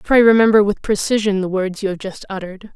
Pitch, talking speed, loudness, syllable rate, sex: 200 Hz, 220 wpm, -16 LUFS, 6.2 syllables/s, female